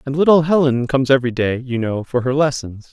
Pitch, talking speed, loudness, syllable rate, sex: 135 Hz, 225 wpm, -17 LUFS, 6.1 syllables/s, male